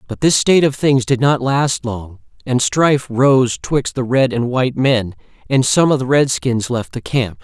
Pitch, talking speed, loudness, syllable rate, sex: 130 Hz, 220 wpm, -16 LUFS, 4.5 syllables/s, male